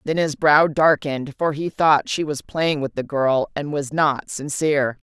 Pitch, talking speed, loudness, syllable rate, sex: 145 Hz, 200 wpm, -20 LUFS, 4.3 syllables/s, female